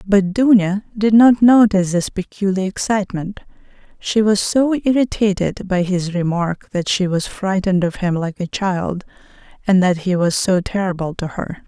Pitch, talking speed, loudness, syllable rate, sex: 195 Hz, 165 wpm, -17 LUFS, 4.7 syllables/s, female